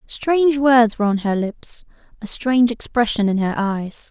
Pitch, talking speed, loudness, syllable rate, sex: 230 Hz, 175 wpm, -18 LUFS, 4.7 syllables/s, female